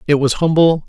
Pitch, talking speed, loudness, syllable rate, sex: 155 Hz, 205 wpm, -14 LUFS, 5.6 syllables/s, male